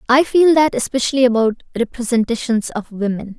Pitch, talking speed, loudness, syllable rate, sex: 240 Hz, 140 wpm, -17 LUFS, 5.5 syllables/s, female